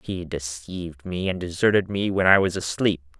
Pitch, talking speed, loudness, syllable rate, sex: 90 Hz, 190 wpm, -23 LUFS, 5.1 syllables/s, male